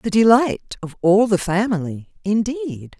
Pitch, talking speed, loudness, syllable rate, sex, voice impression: 205 Hz, 140 wpm, -18 LUFS, 4.3 syllables/s, female, feminine, very gender-neutral, very adult-like, thin, slightly tensed, slightly powerful, bright, soft, clear, fluent, cute, refreshing, sincere, very calm, mature, friendly, reassuring, slightly unique, elegant, slightly wild, sweet, lively, kind, modest, light